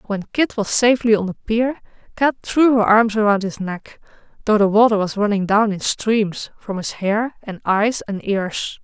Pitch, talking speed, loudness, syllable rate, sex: 215 Hz, 195 wpm, -18 LUFS, 4.5 syllables/s, female